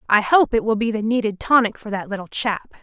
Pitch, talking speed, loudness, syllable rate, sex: 220 Hz, 255 wpm, -20 LUFS, 5.9 syllables/s, female